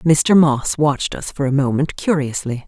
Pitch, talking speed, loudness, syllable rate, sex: 145 Hz, 180 wpm, -17 LUFS, 4.6 syllables/s, female